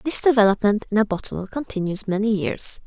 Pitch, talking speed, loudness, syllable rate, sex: 215 Hz, 165 wpm, -21 LUFS, 5.6 syllables/s, female